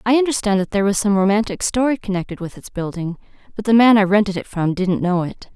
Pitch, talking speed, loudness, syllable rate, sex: 200 Hz, 240 wpm, -18 LUFS, 6.3 syllables/s, female